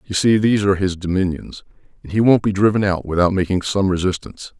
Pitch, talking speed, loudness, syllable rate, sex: 95 Hz, 210 wpm, -18 LUFS, 6.4 syllables/s, male